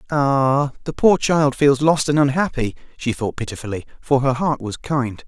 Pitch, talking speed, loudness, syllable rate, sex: 135 Hz, 180 wpm, -19 LUFS, 4.6 syllables/s, male